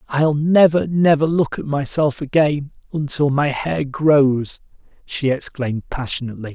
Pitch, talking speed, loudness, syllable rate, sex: 145 Hz, 130 wpm, -18 LUFS, 4.4 syllables/s, male